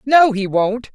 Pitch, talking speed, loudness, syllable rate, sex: 230 Hz, 190 wpm, -16 LUFS, 3.5 syllables/s, female